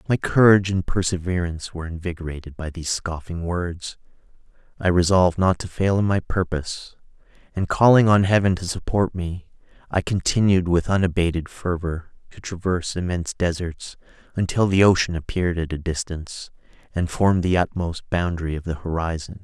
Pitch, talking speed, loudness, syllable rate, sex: 90 Hz, 150 wpm, -22 LUFS, 5.6 syllables/s, male